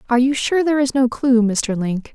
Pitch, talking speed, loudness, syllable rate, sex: 250 Hz, 250 wpm, -18 LUFS, 5.6 syllables/s, female